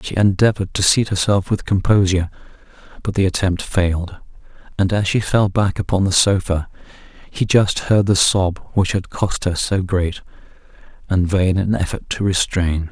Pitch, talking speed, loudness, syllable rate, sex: 95 Hz, 165 wpm, -18 LUFS, 4.8 syllables/s, male